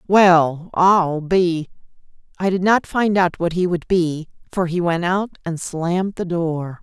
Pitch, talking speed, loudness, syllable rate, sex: 175 Hz, 175 wpm, -19 LUFS, 3.8 syllables/s, female